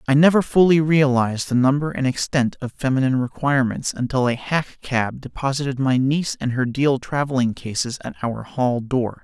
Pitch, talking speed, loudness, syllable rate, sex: 135 Hz, 175 wpm, -20 LUFS, 5.3 syllables/s, male